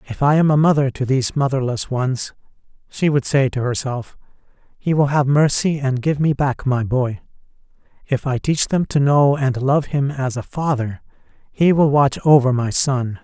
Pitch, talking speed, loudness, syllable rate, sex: 135 Hz, 190 wpm, -18 LUFS, 4.7 syllables/s, male